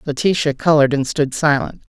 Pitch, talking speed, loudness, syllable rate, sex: 150 Hz, 155 wpm, -17 LUFS, 5.8 syllables/s, female